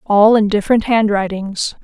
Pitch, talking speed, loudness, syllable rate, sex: 210 Hz, 130 wpm, -14 LUFS, 4.8 syllables/s, female